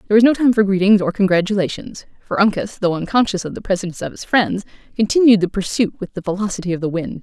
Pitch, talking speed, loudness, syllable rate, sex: 200 Hz, 225 wpm, -18 LUFS, 6.8 syllables/s, female